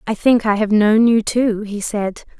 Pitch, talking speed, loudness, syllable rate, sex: 215 Hz, 225 wpm, -16 LUFS, 4.3 syllables/s, female